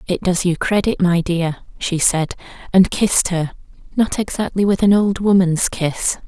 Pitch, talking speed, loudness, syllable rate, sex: 185 Hz, 170 wpm, -17 LUFS, 4.5 syllables/s, female